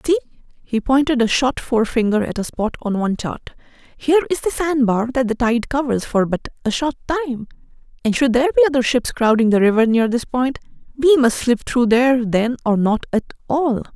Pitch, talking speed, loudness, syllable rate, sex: 250 Hz, 195 wpm, -18 LUFS, 5.8 syllables/s, female